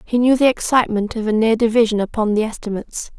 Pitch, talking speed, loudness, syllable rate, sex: 225 Hz, 205 wpm, -17 LUFS, 6.6 syllables/s, female